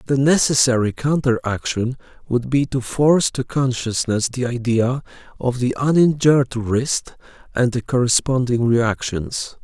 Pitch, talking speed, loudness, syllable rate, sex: 125 Hz, 125 wpm, -19 LUFS, 4.3 syllables/s, male